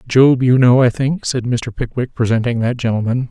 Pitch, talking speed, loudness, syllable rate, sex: 125 Hz, 200 wpm, -15 LUFS, 5.1 syllables/s, male